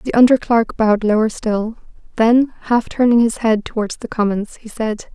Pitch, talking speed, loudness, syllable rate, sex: 225 Hz, 185 wpm, -17 LUFS, 4.8 syllables/s, female